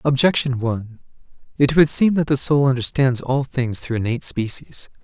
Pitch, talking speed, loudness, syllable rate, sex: 130 Hz, 165 wpm, -19 LUFS, 5.2 syllables/s, male